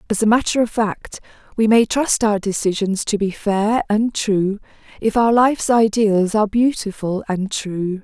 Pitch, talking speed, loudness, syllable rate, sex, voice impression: 210 Hz, 170 wpm, -18 LUFS, 4.5 syllables/s, female, very feminine, slightly young, slightly adult-like, thin, tensed, slightly powerful, slightly bright, hard, clear, very fluent, slightly raspy, cool, slightly intellectual, refreshing, slightly sincere, slightly calm, slightly friendly, slightly reassuring, unique, slightly elegant, wild, slightly sweet, slightly lively, intense, slightly sharp